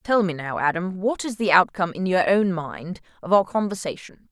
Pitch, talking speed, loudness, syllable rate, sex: 185 Hz, 210 wpm, -22 LUFS, 5.2 syllables/s, female